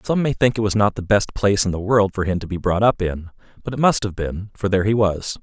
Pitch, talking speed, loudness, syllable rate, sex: 100 Hz, 310 wpm, -20 LUFS, 6.0 syllables/s, male